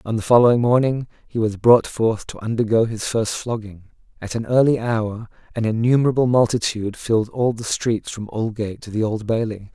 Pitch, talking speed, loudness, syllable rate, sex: 115 Hz, 185 wpm, -20 LUFS, 5.4 syllables/s, male